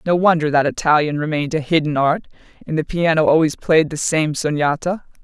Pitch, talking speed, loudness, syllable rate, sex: 155 Hz, 185 wpm, -18 LUFS, 5.7 syllables/s, female